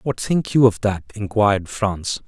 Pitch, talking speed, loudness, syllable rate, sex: 105 Hz, 185 wpm, -20 LUFS, 4.2 syllables/s, male